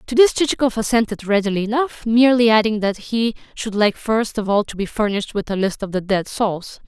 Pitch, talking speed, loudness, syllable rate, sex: 215 Hz, 210 wpm, -19 LUFS, 5.7 syllables/s, female